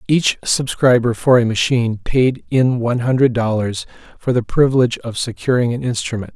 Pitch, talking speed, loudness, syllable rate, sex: 120 Hz, 160 wpm, -17 LUFS, 5.4 syllables/s, male